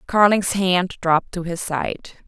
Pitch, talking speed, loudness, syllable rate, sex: 180 Hz, 160 wpm, -20 LUFS, 4.0 syllables/s, female